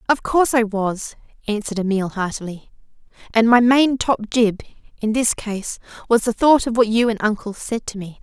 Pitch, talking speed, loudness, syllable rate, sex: 220 Hz, 190 wpm, -19 LUFS, 5.2 syllables/s, female